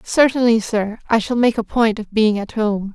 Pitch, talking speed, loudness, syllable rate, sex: 220 Hz, 225 wpm, -18 LUFS, 4.8 syllables/s, female